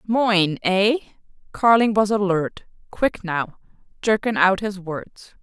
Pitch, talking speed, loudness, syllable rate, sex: 200 Hz, 120 wpm, -20 LUFS, 3.8 syllables/s, female